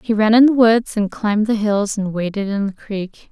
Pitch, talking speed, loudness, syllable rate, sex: 210 Hz, 255 wpm, -17 LUFS, 5.0 syllables/s, female